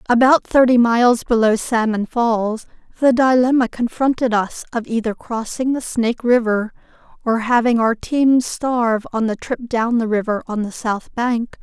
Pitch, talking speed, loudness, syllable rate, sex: 235 Hz, 160 wpm, -18 LUFS, 4.5 syllables/s, female